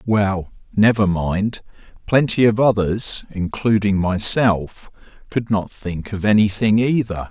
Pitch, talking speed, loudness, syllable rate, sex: 105 Hz, 115 wpm, -18 LUFS, 3.8 syllables/s, male